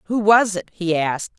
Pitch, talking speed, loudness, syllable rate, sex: 190 Hz, 215 wpm, -19 LUFS, 5.3 syllables/s, female